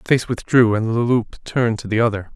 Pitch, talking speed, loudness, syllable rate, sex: 115 Hz, 255 wpm, -19 LUFS, 6.1 syllables/s, male